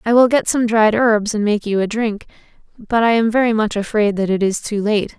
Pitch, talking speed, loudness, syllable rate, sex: 215 Hz, 255 wpm, -16 LUFS, 5.4 syllables/s, female